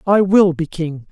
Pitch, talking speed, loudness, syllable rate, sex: 175 Hz, 215 wpm, -16 LUFS, 4.2 syllables/s, male